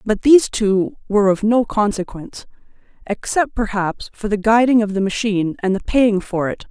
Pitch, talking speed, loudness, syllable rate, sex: 210 Hz, 170 wpm, -17 LUFS, 5.2 syllables/s, female